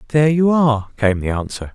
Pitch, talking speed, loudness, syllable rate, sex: 130 Hz, 205 wpm, -17 LUFS, 6.1 syllables/s, male